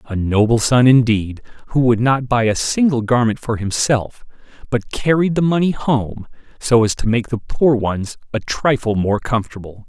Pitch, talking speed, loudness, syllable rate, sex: 120 Hz, 175 wpm, -17 LUFS, 4.7 syllables/s, male